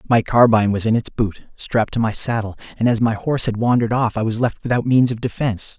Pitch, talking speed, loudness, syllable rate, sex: 115 Hz, 250 wpm, -18 LUFS, 6.4 syllables/s, male